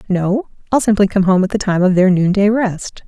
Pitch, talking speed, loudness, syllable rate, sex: 200 Hz, 235 wpm, -15 LUFS, 5.3 syllables/s, female